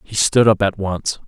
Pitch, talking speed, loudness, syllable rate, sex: 100 Hz, 235 wpm, -17 LUFS, 4.4 syllables/s, male